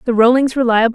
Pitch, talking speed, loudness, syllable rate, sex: 240 Hz, 190 wpm, -13 LUFS, 7.0 syllables/s, female